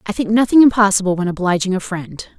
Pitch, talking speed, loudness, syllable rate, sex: 200 Hz, 200 wpm, -15 LUFS, 6.2 syllables/s, female